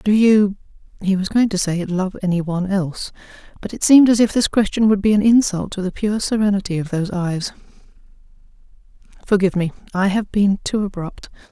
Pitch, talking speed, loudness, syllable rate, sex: 195 Hz, 175 wpm, -18 LUFS, 5.9 syllables/s, female